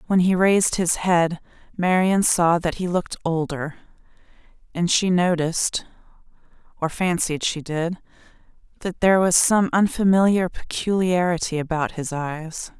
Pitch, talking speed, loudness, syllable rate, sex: 175 Hz, 115 wpm, -21 LUFS, 4.6 syllables/s, female